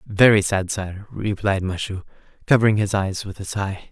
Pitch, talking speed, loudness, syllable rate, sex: 100 Hz, 170 wpm, -21 LUFS, 4.9 syllables/s, male